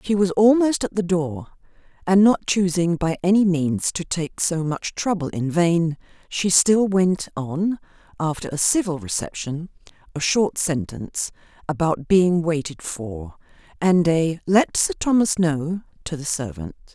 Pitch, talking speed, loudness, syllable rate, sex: 170 Hz, 150 wpm, -21 LUFS, 4.1 syllables/s, female